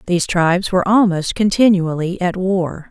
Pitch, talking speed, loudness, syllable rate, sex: 185 Hz, 145 wpm, -16 LUFS, 5.1 syllables/s, female